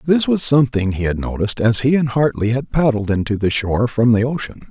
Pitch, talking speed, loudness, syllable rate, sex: 120 Hz, 240 wpm, -17 LUFS, 6.0 syllables/s, male